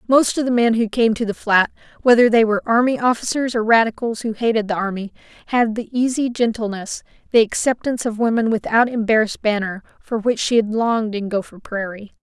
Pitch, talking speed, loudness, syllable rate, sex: 225 Hz, 190 wpm, -19 LUFS, 5.8 syllables/s, female